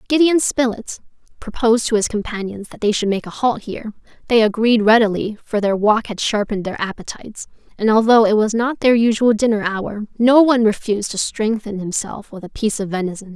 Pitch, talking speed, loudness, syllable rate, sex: 220 Hz, 195 wpm, -17 LUFS, 5.8 syllables/s, female